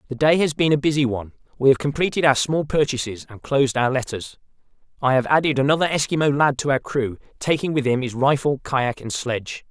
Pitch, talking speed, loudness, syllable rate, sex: 135 Hz, 210 wpm, -21 LUFS, 6.0 syllables/s, male